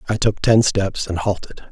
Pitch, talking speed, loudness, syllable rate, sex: 100 Hz, 210 wpm, -19 LUFS, 4.8 syllables/s, male